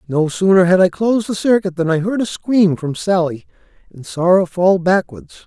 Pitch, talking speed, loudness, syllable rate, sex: 185 Hz, 210 wpm, -15 LUFS, 5.1 syllables/s, male